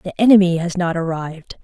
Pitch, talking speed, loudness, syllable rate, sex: 175 Hz, 185 wpm, -17 LUFS, 6.1 syllables/s, female